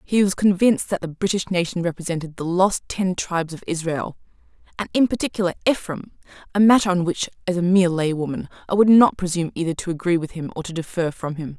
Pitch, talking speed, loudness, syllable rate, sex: 175 Hz, 200 wpm, -21 LUFS, 6.3 syllables/s, female